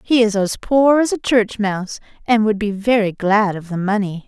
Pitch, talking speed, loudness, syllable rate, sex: 215 Hz, 225 wpm, -17 LUFS, 4.9 syllables/s, female